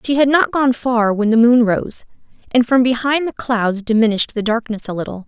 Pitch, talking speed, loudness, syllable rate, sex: 235 Hz, 215 wpm, -16 LUFS, 5.3 syllables/s, female